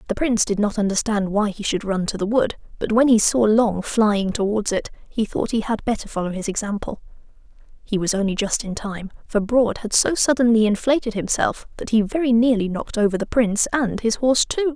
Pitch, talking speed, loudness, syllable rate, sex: 220 Hz, 215 wpm, -20 LUFS, 5.6 syllables/s, female